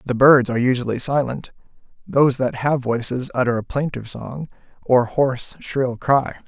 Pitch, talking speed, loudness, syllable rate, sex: 130 Hz, 160 wpm, -20 LUFS, 5.0 syllables/s, male